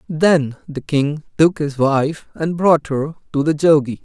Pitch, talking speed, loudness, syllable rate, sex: 150 Hz, 180 wpm, -17 LUFS, 3.9 syllables/s, male